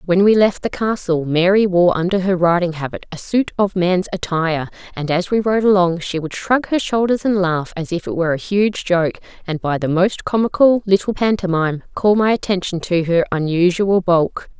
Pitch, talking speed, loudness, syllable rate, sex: 185 Hz, 200 wpm, -17 LUFS, 5.2 syllables/s, female